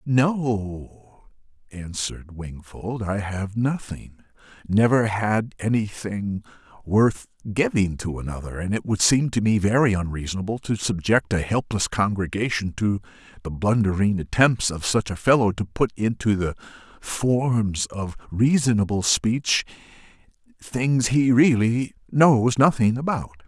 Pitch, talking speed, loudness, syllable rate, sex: 110 Hz, 125 wpm, -22 LUFS, 4.1 syllables/s, male